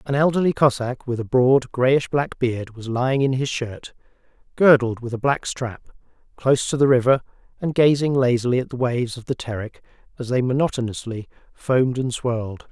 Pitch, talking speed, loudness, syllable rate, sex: 125 Hz, 180 wpm, -21 LUFS, 5.4 syllables/s, male